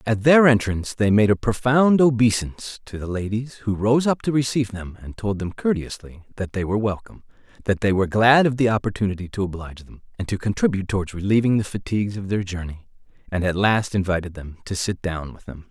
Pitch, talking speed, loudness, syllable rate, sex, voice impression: 105 Hz, 210 wpm, -21 LUFS, 6.2 syllables/s, male, masculine, middle-aged, tensed, powerful, slightly hard, clear, raspy, cool, slightly intellectual, calm, mature, slightly friendly, reassuring, wild, lively, slightly strict, slightly sharp